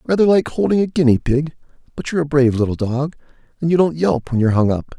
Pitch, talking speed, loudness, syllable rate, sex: 145 Hz, 240 wpm, -17 LUFS, 6.7 syllables/s, male